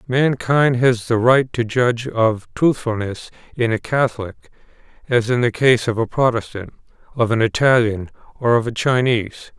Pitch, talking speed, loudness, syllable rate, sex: 120 Hz, 155 wpm, -18 LUFS, 4.9 syllables/s, male